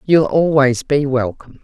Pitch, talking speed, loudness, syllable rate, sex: 140 Hz, 145 wpm, -15 LUFS, 4.6 syllables/s, female